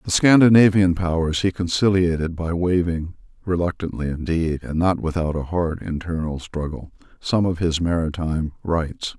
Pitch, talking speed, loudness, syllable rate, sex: 85 Hz, 135 wpm, -21 LUFS, 4.8 syllables/s, male